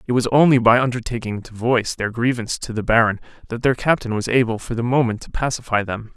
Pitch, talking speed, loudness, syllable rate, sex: 120 Hz, 225 wpm, -19 LUFS, 6.4 syllables/s, male